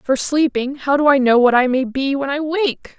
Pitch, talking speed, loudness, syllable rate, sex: 275 Hz, 260 wpm, -17 LUFS, 4.8 syllables/s, female